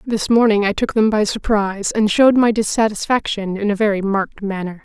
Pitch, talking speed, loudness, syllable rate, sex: 210 Hz, 200 wpm, -17 LUFS, 5.7 syllables/s, female